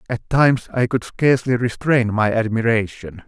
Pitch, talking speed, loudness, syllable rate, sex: 115 Hz, 145 wpm, -18 LUFS, 4.9 syllables/s, male